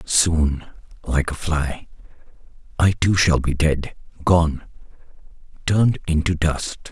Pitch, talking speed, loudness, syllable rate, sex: 80 Hz, 115 wpm, -20 LUFS, 3.6 syllables/s, male